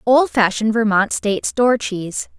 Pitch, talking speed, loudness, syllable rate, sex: 220 Hz, 125 wpm, -17 LUFS, 5.4 syllables/s, female